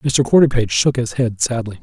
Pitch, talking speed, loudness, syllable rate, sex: 120 Hz, 195 wpm, -16 LUFS, 5.7 syllables/s, male